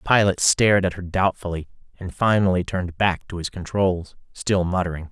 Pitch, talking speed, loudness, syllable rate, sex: 90 Hz, 175 wpm, -22 LUFS, 5.6 syllables/s, male